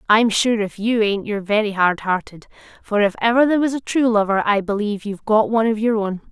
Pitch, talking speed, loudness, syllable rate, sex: 215 Hz, 235 wpm, -19 LUFS, 6.2 syllables/s, female